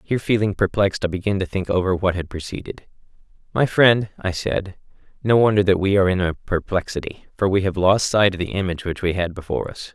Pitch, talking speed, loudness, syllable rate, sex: 95 Hz, 210 wpm, -20 LUFS, 6.2 syllables/s, male